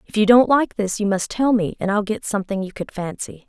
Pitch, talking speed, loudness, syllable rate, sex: 210 Hz, 275 wpm, -20 LUFS, 5.8 syllables/s, female